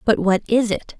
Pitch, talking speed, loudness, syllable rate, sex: 215 Hz, 240 wpm, -19 LUFS, 4.8 syllables/s, female